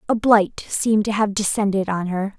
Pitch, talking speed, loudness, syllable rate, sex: 205 Hz, 200 wpm, -20 LUFS, 5.1 syllables/s, female